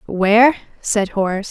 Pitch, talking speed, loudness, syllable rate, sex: 210 Hz, 120 wpm, -16 LUFS, 5.2 syllables/s, female